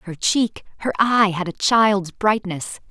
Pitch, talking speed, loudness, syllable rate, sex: 200 Hz, 165 wpm, -19 LUFS, 3.7 syllables/s, female